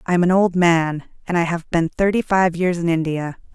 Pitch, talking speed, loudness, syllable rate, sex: 175 Hz, 235 wpm, -19 LUFS, 5.3 syllables/s, female